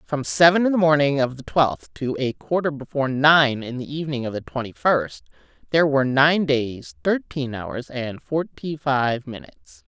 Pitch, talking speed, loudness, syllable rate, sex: 140 Hz, 180 wpm, -21 LUFS, 4.8 syllables/s, female